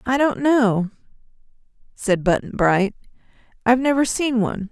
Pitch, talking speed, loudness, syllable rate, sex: 230 Hz, 125 wpm, -20 LUFS, 5.0 syllables/s, female